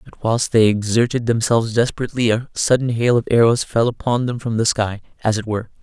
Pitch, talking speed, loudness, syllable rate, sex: 115 Hz, 205 wpm, -18 LUFS, 6.0 syllables/s, male